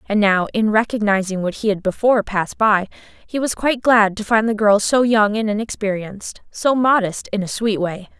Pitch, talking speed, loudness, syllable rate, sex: 210 Hz, 200 wpm, -18 LUFS, 5.4 syllables/s, female